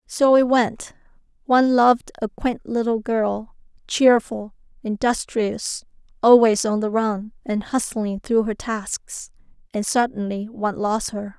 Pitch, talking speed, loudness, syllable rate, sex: 225 Hz, 130 wpm, -21 LUFS, 4.0 syllables/s, female